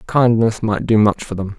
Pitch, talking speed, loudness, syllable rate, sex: 110 Hz, 225 wpm, -16 LUFS, 4.8 syllables/s, male